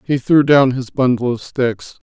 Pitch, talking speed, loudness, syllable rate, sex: 130 Hz, 205 wpm, -15 LUFS, 4.3 syllables/s, male